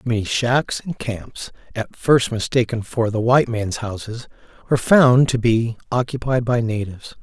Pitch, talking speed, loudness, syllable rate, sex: 115 Hz, 160 wpm, -19 LUFS, 4.6 syllables/s, male